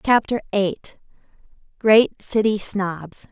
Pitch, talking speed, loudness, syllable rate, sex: 205 Hz, 70 wpm, -20 LUFS, 3.1 syllables/s, female